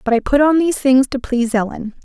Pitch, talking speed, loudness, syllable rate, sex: 255 Hz, 265 wpm, -16 LUFS, 6.4 syllables/s, female